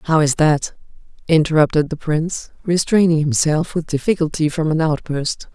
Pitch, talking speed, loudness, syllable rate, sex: 155 Hz, 140 wpm, -18 LUFS, 5.0 syllables/s, female